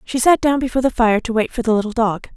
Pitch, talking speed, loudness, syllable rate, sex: 235 Hz, 305 wpm, -17 LUFS, 6.8 syllables/s, female